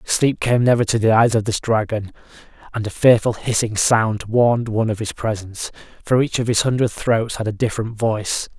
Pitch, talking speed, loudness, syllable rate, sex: 110 Hz, 205 wpm, -19 LUFS, 5.5 syllables/s, male